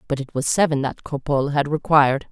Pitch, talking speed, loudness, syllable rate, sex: 145 Hz, 205 wpm, -20 LUFS, 6.2 syllables/s, female